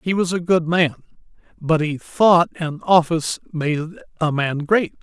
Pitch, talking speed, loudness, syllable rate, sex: 165 Hz, 165 wpm, -19 LUFS, 4.7 syllables/s, male